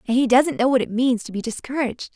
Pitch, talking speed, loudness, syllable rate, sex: 250 Hz, 280 wpm, -21 LUFS, 6.5 syllables/s, female